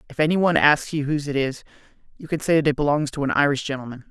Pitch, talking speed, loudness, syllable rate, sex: 145 Hz, 265 wpm, -21 LUFS, 7.5 syllables/s, male